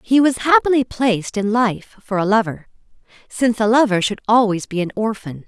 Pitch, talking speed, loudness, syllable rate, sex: 225 Hz, 185 wpm, -17 LUFS, 5.4 syllables/s, female